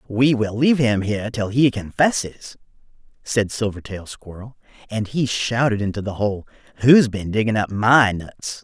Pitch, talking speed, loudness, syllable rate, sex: 110 Hz, 155 wpm, -19 LUFS, 4.8 syllables/s, male